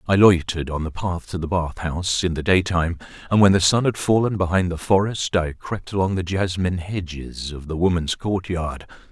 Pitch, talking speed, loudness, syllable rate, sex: 90 Hz, 205 wpm, -21 LUFS, 5.4 syllables/s, male